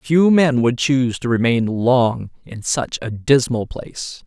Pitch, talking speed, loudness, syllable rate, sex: 125 Hz, 170 wpm, -18 LUFS, 3.9 syllables/s, male